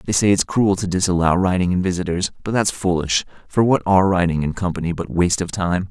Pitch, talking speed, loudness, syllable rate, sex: 90 Hz, 225 wpm, -19 LUFS, 6.1 syllables/s, male